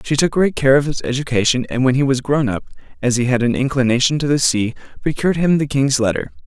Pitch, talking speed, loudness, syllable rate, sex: 135 Hz, 240 wpm, -17 LUFS, 6.3 syllables/s, male